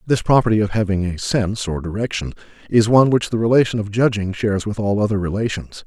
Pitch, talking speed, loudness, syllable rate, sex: 105 Hz, 205 wpm, -19 LUFS, 6.3 syllables/s, male